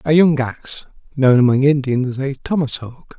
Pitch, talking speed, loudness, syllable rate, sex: 135 Hz, 170 wpm, -17 LUFS, 5.2 syllables/s, male